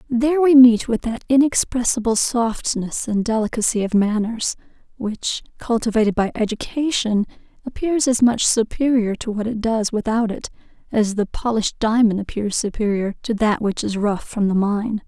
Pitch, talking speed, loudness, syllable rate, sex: 225 Hz, 155 wpm, -19 LUFS, 4.9 syllables/s, female